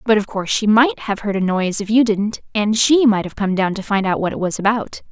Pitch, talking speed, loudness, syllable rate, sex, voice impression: 210 Hz, 295 wpm, -17 LUFS, 5.8 syllables/s, female, very feminine, young, thin, tensed, slightly powerful, very bright, slightly hard, very clear, fluent, very cute, slightly intellectual, very refreshing, sincere, slightly calm, friendly, reassuring, slightly unique, wild, slightly sweet, very lively, kind, slightly intense, slightly sharp